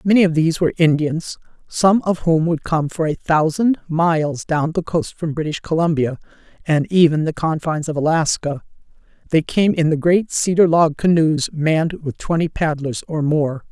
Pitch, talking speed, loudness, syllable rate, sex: 160 Hz, 175 wpm, -18 LUFS, 4.9 syllables/s, female